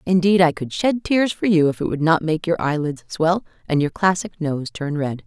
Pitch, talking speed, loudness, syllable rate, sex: 170 Hz, 240 wpm, -20 LUFS, 5.0 syllables/s, female